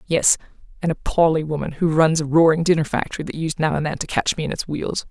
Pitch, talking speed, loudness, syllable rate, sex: 160 Hz, 245 wpm, -20 LUFS, 6.2 syllables/s, female